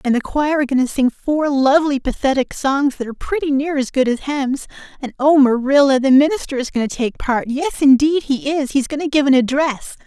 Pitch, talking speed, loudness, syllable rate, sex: 275 Hz, 230 wpm, -17 LUFS, 5.5 syllables/s, female